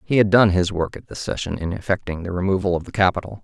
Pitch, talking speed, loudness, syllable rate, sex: 95 Hz, 260 wpm, -21 LUFS, 6.6 syllables/s, male